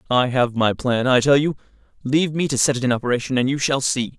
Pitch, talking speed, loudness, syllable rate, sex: 130 Hz, 260 wpm, -19 LUFS, 6.2 syllables/s, male